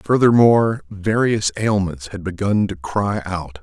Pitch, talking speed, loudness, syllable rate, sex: 95 Hz, 135 wpm, -18 LUFS, 4.1 syllables/s, male